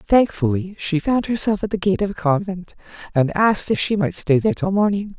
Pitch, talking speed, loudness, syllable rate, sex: 195 Hz, 220 wpm, -20 LUFS, 5.5 syllables/s, female